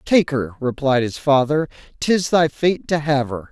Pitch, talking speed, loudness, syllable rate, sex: 145 Hz, 190 wpm, -19 LUFS, 4.3 syllables/s, male